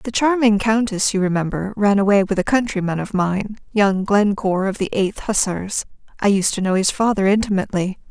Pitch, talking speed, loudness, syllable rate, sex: 200 Hz, 185 wpm, -19 LUFS, 5.4 syllables/s, female